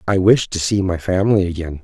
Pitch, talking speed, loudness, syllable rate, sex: 95 Hz, 230 wpm, -17 LUFS, 6.0 syllables/s, male